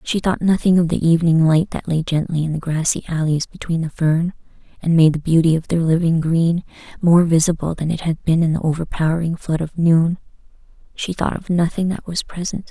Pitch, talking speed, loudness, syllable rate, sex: 165 Hz, 210 wpm, -18 LUFS, 5.6 syllables/s, female